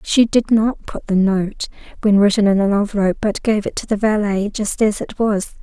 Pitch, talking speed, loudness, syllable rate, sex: 210 Hz, 225 wpm, -17 LUFS, 5.1 syllables/s, female